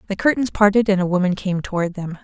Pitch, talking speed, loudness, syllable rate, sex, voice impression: 195 Hz, 240 wpm, -19 LUFS, 6.4 syllables/s, female, feminine, adult-like, slightly soft, calm, friendly, slightly sweet, slightly kind